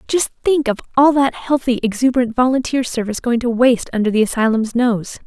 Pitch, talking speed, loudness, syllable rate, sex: 245 Hz, 180 wpm, -17 LUFS, 5.8 syllables/s, female